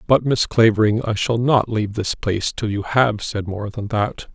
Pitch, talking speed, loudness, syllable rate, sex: 110 Hz, 220 wpm, -19 LUFS, 4.8 syllables/s, male